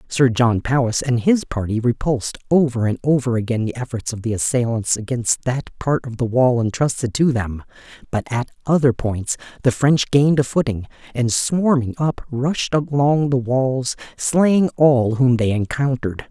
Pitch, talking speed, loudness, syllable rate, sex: 125 Hz, 170 wpm, -19 LUFS, 4.6 syllables/s, male